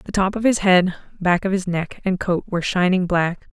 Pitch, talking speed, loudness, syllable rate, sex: 185 Hz, 235 wpm, -20 LUFS, 5.3 syllables/s, female